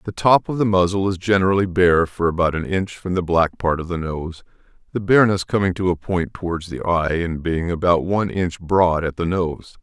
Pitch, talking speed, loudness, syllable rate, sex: 90 Hz, 225 wpm, -20 LUFS, 5.3 syllables/s, male